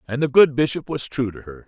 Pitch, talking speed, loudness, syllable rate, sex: 130 Hz, 285 wpm, -20 LUFS, 6.0 syllables/s, male